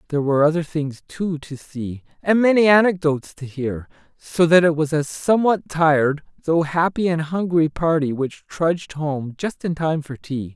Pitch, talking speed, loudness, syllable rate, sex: 160 Hz, 180 wpm, -20 LUFS, 4.9 syllables/s, male